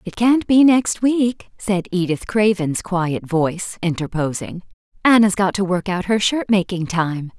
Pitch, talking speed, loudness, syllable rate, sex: 195 Hz, 160 wpm, -18 LUFS, 4.2 syllables/s, female